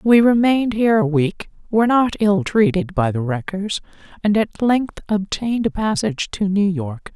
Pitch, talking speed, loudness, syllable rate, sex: 205 Hz, 175 wpm, -18 LUFS, 4.9 syllables/s, female